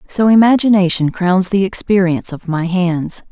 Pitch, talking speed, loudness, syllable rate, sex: 185 Hz, 145 wpm, -14 LUFS, 4.8 syllables/s, female